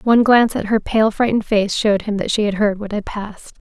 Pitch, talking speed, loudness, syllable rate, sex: 210 Hz, 260 wpm, -17 LUFS, 6.3 syllables/s, female